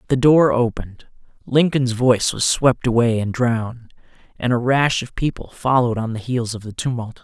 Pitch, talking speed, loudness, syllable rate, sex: 120 Hz, 180 wpm, -19 LUFS, 5.1 syllables/s, male